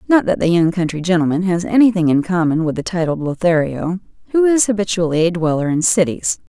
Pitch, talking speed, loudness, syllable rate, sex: 180 Hz, 195 wpm, -16 LUFS, 5.9 syllables/s, female